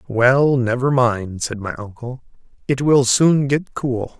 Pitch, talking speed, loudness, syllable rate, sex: 125 Hz, 155 wpm, -18 LUFS, 3.7 syllables/s, male